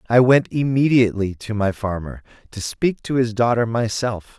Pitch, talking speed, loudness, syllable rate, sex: 115 Hz, 165 wpm, -20 LUFS, 4.8 syllables/s, male